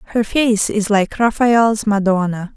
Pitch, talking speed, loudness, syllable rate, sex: 210 Hz, 140 wpm, -16 LUFS, 4.0 syllables/s, female